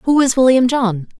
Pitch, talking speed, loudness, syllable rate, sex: 245 Hz, 200 wpm, -14 LUFS, 4.7 syllables/s, female